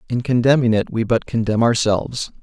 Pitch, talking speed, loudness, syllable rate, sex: 115 Hz, 175 wpm, -18 LUFS, 5.5 syllables/s, male